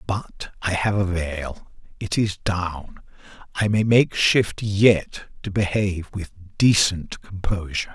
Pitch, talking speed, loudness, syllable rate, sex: 95 Hz, 130 wpm, -22 LUFS, 3.7 syllables/s, male